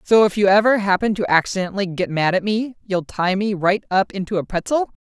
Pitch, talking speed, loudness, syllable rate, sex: 200 Hz, 225 wpm, -19 LUFS, 5.8 syllables/s, female